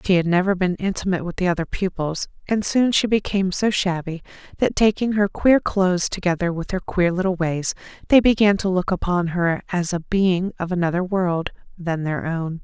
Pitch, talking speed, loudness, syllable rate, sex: 180 Hz, 195 wpm, -21 LUFS, 5.3 syllables/s, female